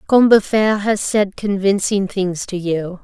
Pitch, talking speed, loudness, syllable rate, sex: 200 Hz, 140 wpm, -17 LUFS, 4.2 syllables/s, female